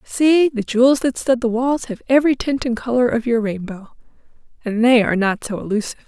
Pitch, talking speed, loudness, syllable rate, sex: 240 Hz, 200 wpm, -18 LUFS, 5.7 syllables/s, female